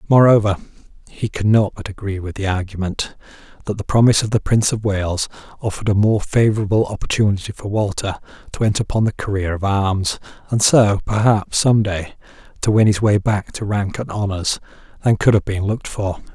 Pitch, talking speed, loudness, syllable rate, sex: 105 Hz, 185 wpm, -18 LUFS, 5.8 syllables/s, male